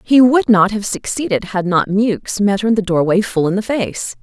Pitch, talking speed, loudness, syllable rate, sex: 205 Hz, 240 wpm, -15 LUFS, 4.9 syllables/s, female